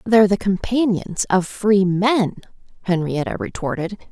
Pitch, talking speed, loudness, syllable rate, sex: 195 Hz, 100 wpm, -19 LUFS, 4.5 syllables/s, female